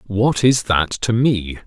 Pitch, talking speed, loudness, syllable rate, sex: 110 Hz, 180 wpm, -17 LUFS, 3.5 syllables/s, male